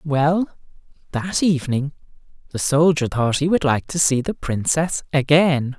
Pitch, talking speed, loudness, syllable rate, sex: 150 Hz, 145 wpm, -19 LUFS, 4.3 syllables/s, male